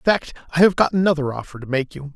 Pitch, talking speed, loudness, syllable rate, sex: 155 Hz, 280 wpm, -20 LUFS, 7.2 syllables/s, male